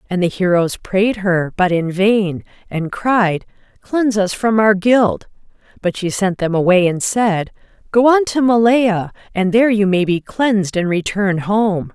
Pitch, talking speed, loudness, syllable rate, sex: 200 Hz, 175 wpm, -16 LUFS, 4.2 syllables/s, female